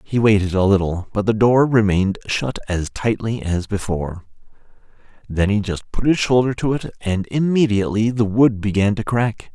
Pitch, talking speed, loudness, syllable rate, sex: 105 Hz, 175 wpm, -19 LUFS, 5.1 syllables/s, male